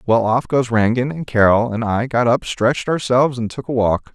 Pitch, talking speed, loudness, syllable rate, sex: 120 Hz, 230 wpm, -17 LUFS, 5.2 syllables/s, male